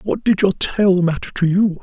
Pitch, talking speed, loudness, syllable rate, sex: 190 Hz, 230 wpm, -17 LUFS, 4.6 syllables/s, male